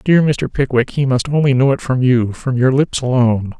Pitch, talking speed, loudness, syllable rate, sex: 130 Hz, 215 wpm, -15 LUFS, 5.2 syllables/s, male